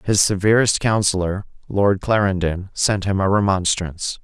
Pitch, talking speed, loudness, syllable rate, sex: 95 Hz, 125 wpm, -19 LUFS, 4.7 syllables/s, male